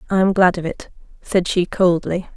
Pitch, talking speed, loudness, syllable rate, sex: 180 Hz, 205 wpm, -18 LUFS, 5.0 syllables/s, female